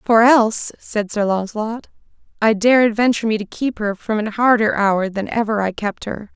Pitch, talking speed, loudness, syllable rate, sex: 215 Hz, 200 wpm, -18 LUFS, 5.1 syllables/s, female